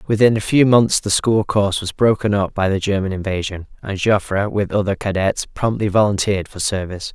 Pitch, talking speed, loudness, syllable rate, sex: 100 Hz, 195 wpm, -18 LUFS, 5.6 syllables/s, male